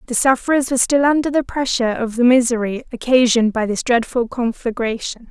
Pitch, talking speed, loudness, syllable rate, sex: 245 Hz, 170 wpm, -17 LUFS, 6.0 syllables/s, female